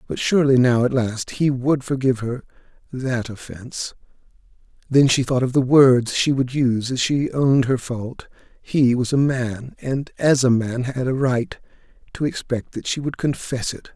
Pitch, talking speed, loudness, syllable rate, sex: 130 Hz, 185 wpm, -20 LUFS, 4.7 syllables/s, male